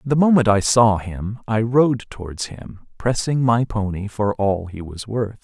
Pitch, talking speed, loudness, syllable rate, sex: 110 Hz, 190 wpm, -20 LUFS, 4.1 syllables/s, male